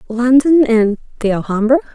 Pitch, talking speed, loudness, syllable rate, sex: 240 Hz, 125 wpm, -14 LUFS, 5.0 syllables/s, female